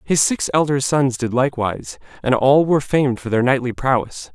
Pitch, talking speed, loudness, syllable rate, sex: 135 Hz, 195 wpm, -18 LUFS, 5.5 syllables/s, male